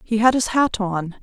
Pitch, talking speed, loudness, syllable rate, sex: 215 Hz, 245 wpm, -19 LUFS, 4.6 syllables/s, female